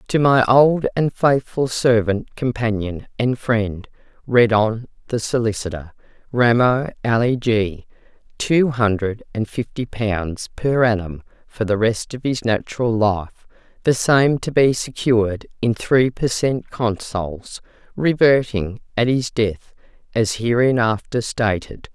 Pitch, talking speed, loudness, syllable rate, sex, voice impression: 115 Hz, 125 wpm, -19 LUFS, 3.8 syllables/s, female, masculine, adult-like, slightly tensed, slightly dark, slightly hard, muffled, calm, reassuring, slightly unique, kind, modest